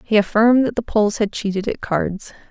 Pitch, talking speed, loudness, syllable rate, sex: 215 Hz, 215 wpm, -19 LUFS, 5.8 syllables/s, female